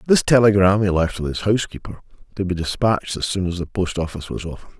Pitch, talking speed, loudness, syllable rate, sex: 95 Hz, 215 wpm, -20 LUFS, 6.9 syllables/s, male